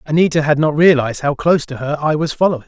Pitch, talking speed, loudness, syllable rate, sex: 150 Hz, 245 wpm, -15 LUFS, 7.1 syllables/s, male